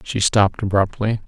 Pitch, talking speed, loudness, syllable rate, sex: 105 Hz, 140 wpm, -19 LUFS, 5.3 syllables/s, male